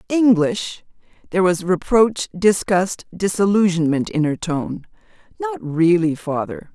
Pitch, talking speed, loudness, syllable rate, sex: 185 Hz, 105 wpm, -19 LUFS, 4.0 syllables/s, female